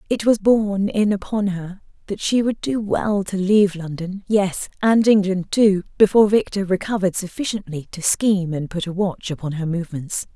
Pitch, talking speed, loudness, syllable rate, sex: 195 Hz, 180 wpm, -20 LUFS, 5.1 syllables/s, female